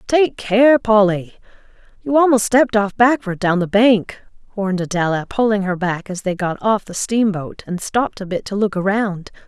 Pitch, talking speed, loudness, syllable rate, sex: 205 Hz, 185 wpm, -17 LUFS, 4.9 syllables/s, female